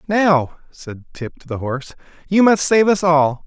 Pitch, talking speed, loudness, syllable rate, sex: 165 Hz, 190 wpm, -16 LUFS, 4.3 syllables/s, male